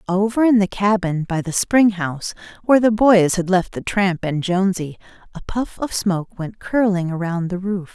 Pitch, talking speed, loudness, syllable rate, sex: 195 Hz, 195 wpm, -19 LUFS, 5.0 syllables/s, female